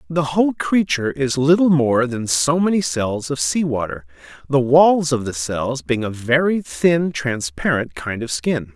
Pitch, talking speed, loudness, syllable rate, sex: 135 Hz, 180 wpm, -18 LUFS, 4.3 syllables/s, male